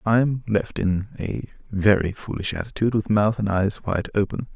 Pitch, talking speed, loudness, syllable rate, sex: 105 Hz, 185 wpm, -23 LUFS, 5.1 syllables/s, male